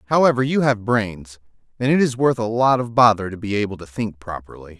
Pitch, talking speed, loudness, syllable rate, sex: 110 Hz, 225 wpm, -19 LUFS, 5.7 syllables/s, male